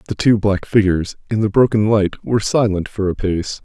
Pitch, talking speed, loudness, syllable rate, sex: 100 Hz, 215 wpm, -17 LUFS, 5.7 syllables/s, male